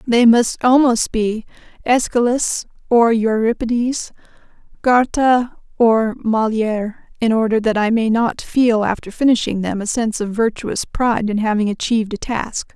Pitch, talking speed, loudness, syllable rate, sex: 230 Hz, 140 wpm, -17 LUFS, 4.5 syllables/s, female